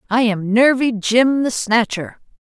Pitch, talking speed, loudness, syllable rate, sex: 230 Hz, 150 wpm, -16 LUFS, 3.9 syllables/s, female